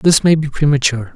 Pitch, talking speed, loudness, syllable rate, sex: 140 Hz, 210 wpm, -14 LUFS, 6.4 syllables/s, male